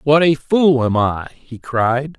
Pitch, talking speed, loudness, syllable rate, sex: 135 Hz, 190 wpm, -16 LUFS, 3.5 syllables/s, male